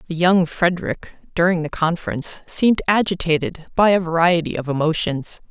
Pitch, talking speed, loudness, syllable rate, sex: 170 Hz, 140 wpm, -19 LUFS, 5.5 syllables/s, female